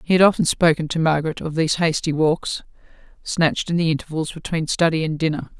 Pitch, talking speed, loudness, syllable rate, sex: 160 Hz, 195 wpm, -20 LUFS, 6.2 syllables/s, female